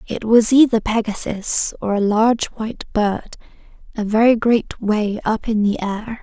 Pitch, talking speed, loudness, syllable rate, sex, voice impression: 220 Hz, 165 wpm, -18 LUFS, 4.3 syllables/s, female, feminine, young, relaxed, weak, bright, soft, raspy, calm, slightly friendly, kind, modest